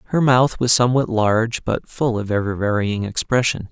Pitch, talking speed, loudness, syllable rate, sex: 115 Hz, 180 wpm, -19 LUFS, 5.2 syllables/s, male